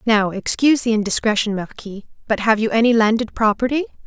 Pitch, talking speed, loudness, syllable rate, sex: 220 Hz, 160 wpm, -18 LUFS, 6.0 syllables/s, female